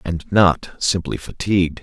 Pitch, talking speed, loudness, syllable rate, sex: 90 Hz, 130 wpm, -19 LUFS, 4.2 syllables/s, male